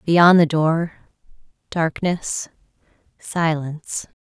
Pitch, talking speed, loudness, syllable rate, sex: 165 Hz, 70 wpm, -20 LUFS, 3.2 syllables/s, female